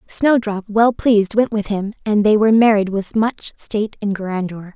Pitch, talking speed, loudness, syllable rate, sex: 210 Hz, 190 wpm, -17 LUFS, 4.8 syllables/s, female